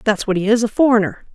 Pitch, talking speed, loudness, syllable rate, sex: 220 Hz, 225 wpm, -16 LUFS, 7.0 syllables/s, female